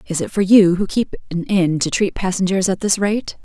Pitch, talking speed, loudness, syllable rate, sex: 185 Hz, 245 wpm, -17 LUFS, 5.2 syllables/s, female